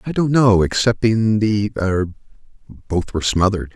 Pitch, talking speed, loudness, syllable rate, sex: 100 Hz, 110 wpm, -18 LUFS, 5.1 syllables/s, male